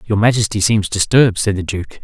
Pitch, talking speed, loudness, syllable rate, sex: 105 Hz, 205 wpm, -15 LUFS, 6.3 syllables/s, male